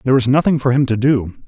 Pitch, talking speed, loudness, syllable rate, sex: 130 Hz, 285 wpm, -15 LUFS, 7.0 syllables/s, male